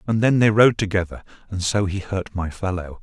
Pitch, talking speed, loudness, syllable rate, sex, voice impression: 100 Hz, 220 wpm, -20 LUFS, 5.3 syllables/s, male, very masculine, very middle-aged, very thick, relaxed, weak, dark, very soft, very muffled, slightly fluent, raspy, cool, intellectual, slightly refreshing, sincere, very calm, very mature, slightly friendly, slightly reassuring, very unique, elegant, slightly wild, very sweet, kind, very modest